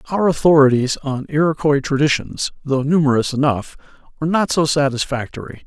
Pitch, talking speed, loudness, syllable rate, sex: 145 Hz, 125 wpm, -17 LUFS, 5.5 syllables/s, male